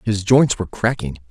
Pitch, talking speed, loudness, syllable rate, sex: 105 Hz, 185 wpm, -18 LUFS, 5.3 syllables/s, male